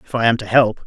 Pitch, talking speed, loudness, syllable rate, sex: 115 Hz, 345 wpm, -16 LUFS, 6.5 syllables/s, male